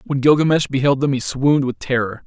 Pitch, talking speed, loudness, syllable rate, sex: 135 Hz, 210 wpm, -17 LUFS, 6.0 syllables/s, male